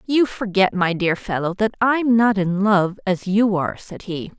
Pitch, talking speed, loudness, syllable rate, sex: 200 Hz, 205 wpm, -19 LUFS, 4.5 syllables/s, female